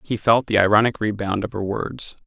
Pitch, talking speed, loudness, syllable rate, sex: 105 Hz, 210 wpm, -20 LUFS, 5.3 syllables/s, male